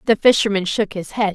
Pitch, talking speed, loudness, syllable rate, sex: 205 Hz, 225 wpm, -18 LUFS, 5.9 syllables/s, female